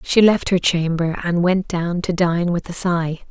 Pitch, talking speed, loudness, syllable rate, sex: 175 Hz, 220 wpm, -19 LUFS, 4.3 syllables/s, female